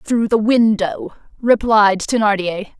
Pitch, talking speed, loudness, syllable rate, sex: 215 Hz, 105 wpm, -16 LUFS, 3.6 syllables/s, female